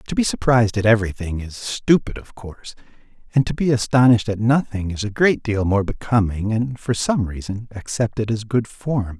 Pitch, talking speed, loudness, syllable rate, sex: 110 Hz, 190 wpm, -20 LUFS, 5.3 syllables/s, male